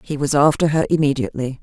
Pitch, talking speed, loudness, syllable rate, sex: 145 Hz, 185 wpm, -18 LUFS, 6.7 syllables/s, female